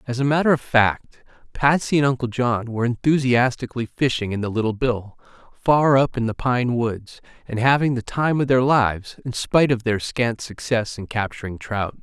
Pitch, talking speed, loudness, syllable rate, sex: 120 Hz, 190 wpm, -21 LUFS, 5.1 syllables/s, male